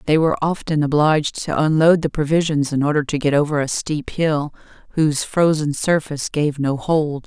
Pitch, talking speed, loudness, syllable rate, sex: 150 Hz, 180 wpm, -19 LUFS, 5.2 syllables/s, female